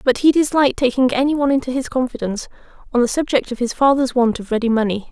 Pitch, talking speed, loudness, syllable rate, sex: 255 Hz, 225 wpm, -18 LUFS, 7.0 syllables/s, female